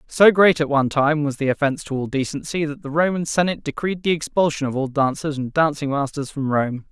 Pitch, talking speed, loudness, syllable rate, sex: 150 Hz, 225 wpm, -20 LUFS, 5.9 syllables/s, male